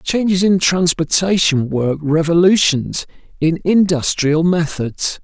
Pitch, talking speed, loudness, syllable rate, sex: 165 Hz, 90 wpm, -15 LUFS, 3.8 syllables/s, male